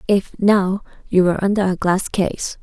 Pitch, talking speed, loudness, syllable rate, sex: 195 Hz, 185 wpm, -18 LUFS, 4.6 syllables/s, female